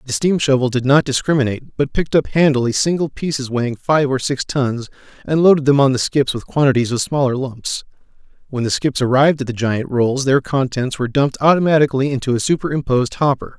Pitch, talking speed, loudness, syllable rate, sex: 135 Hz, 200 wpm, -17 LUFS, 6.1 syllables/s, male